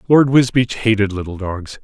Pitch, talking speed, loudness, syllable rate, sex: 110 Hz, 165 wpm, -16 LUFS, 4.9 syllables/s, male